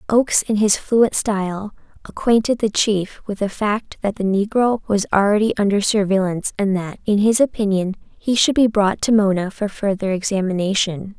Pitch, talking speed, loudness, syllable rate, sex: 205 Hz, 170 wpm, -18 LUFS, 5.0 syllables/s, female